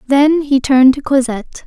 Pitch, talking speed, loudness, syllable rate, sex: 270 Hz, 180 wpm, -12 LUFS, 5.2 syllables/s, female